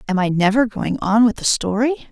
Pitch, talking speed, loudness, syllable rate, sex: 220 Hz, 225 wpm, -18 LUFS, 5.5 syllables/s, female